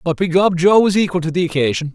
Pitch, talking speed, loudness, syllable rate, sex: 175 Hz, 245 wpm, -15 LUFS, 6.5 syllables/s, male